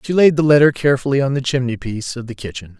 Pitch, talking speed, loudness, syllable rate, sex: 130 Hz, 260 wpm, -16 LUFS, 7.1 syllables/s, male